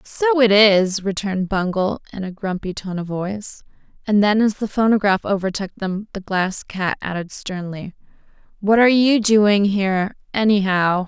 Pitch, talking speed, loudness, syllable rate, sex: 200 Hz, 155 wpm, -19 LUFS, 4.7 syllables/s, female